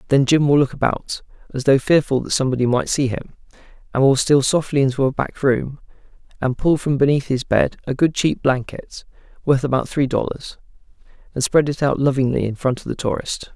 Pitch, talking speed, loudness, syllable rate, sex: 135 Hz, 190 wpm, -19 LUFS, 5.6 syllables/s, male